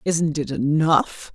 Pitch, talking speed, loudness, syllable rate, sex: 150 Hz, 135 wpm, -20 LUFS, 3.2 syllables/s, female